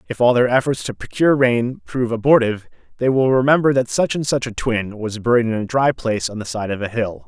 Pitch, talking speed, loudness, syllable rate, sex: 120 Hz, 245 wpm, -18 LUFS, 6.1 syllables/s, male